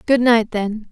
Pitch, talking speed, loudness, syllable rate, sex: 225 Hz, 195 wpm, -17 LUFS, 3.8 syllables/s, female